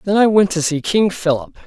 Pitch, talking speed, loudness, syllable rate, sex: 185 Hz, 250 wpm, -16 LUFS, 5.6 syllables/s, male